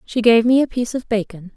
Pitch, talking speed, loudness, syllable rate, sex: 230 Hz, 270 wpm, -17 LUFS, 6.3 syllables/s, female